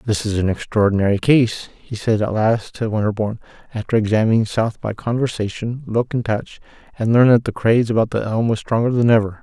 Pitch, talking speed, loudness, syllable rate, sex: 110 Hz, 195 wpm, -18 LUFS, 5.9 syllables/s, male